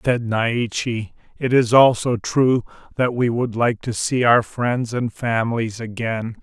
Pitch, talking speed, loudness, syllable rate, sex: 120 Hz, 160 wpm, -20 LUFS, 3.9 syllables/s, male